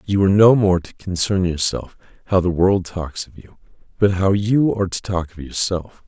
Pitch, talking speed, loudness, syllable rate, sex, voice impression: 95 Hz, 210 wpm, -18 LUFS, 5.0 syllables/s, male, masculine, adult-like, thick, tensed, powerful, hard, slightly halting, intellectual, calm, mature, reassuring, wild, lively, kind, slightly modest